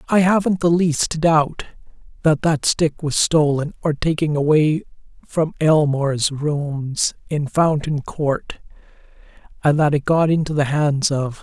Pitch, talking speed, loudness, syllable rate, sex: 150 Hz, 140 wpm, -19 LUFS, 3.9 syllables/s, male